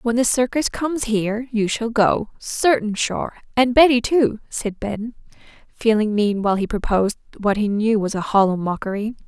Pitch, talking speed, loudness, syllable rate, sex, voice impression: 220 Hz, 175 wpm, -20 LUFS, 4.8 syllables/s, female, very feminine, slightly young, thin, tensed, slightly powerful, very bright, slightly hard, very clear, very fluent, slightly raspy, slightly cute, cool, intellectual, very refreshing, sincere, slightly calm, very friendly, very reassuring, very unique, elegant, very wild, very sweet, lively, strict, slightly intense, slightly sharp, light